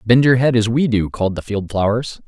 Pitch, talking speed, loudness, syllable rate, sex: 115 Hz, 265 wpm, -17 LUFS, 5.6 syllables/s, male